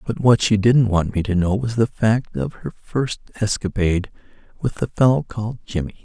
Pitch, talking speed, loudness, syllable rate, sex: 105 Hz, 200 wpm, -20 LUFS, 5.1 syllables/s, male